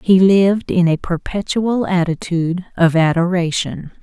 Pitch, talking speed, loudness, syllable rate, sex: 180 Hz, 120 wpm, -16 LUFS, 4.6 syllables/s, female